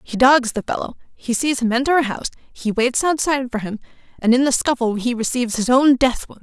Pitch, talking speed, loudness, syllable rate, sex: 250 Hz, 235 wpm, -18 LUFS, 5.9 syllables/s, female